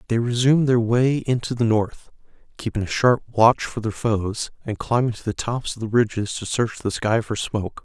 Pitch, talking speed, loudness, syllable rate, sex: 115 Hz, 215 wpm, -22 LUFS, 5.1 syllables/s, male